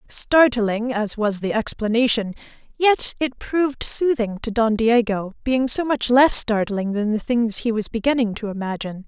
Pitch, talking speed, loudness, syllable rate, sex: 230 Hz, 165 wpm, -20 LUFS, 4.6 syllables/s, female